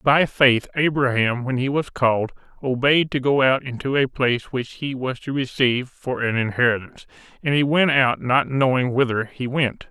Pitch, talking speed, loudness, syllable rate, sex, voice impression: 130 Hz, 190 wpm, -20 LUFS, 4.9 syllables/s, male, very masculine, very adult-like, old, thick, slightly relaxed, slightly powerful, bright, slightly hard, clear, fluent, slightly raspy, cool, very intellectual, slightly refreshing, sincere, slightly calm, mature, friendly, reassuring, very unique, slightly elegant, very wild, slightly lively, kind, slightly intense, slightly sharp, slightly modest